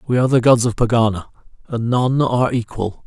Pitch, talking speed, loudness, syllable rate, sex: 120 Hz, 195 wpm, -17 LUFS, 6.0 syllables/s, male